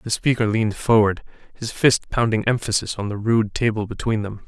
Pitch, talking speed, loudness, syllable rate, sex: 110 Hz, 190 wpm, -21 LUFS, 5.4 syllables/s, male